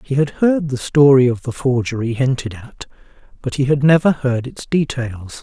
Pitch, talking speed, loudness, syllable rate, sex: 130 Hz, 190 wpm, -17 LUFS, 4.8 syllables/s, male